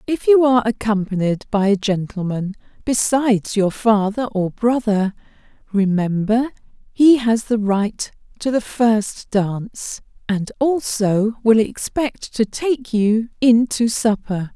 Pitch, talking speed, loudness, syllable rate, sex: 220 Hz, 130 wpm, -18 LUFS, 3.8 syllables/s, female